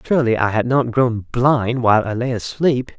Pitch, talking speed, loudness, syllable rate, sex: 120 Hz, 200 wpm, -18 LUFS, 5.0 syllables/s, male